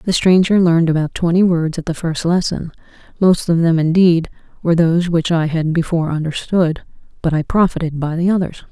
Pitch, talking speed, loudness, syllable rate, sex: 170 Hz, 185 wpm, -16 LUFS, 5.6 syllables/s, female